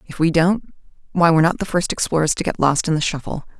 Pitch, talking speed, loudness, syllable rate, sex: 165 Hz, 250 wpm, -19 LUFS, 6.3 syllables/s, female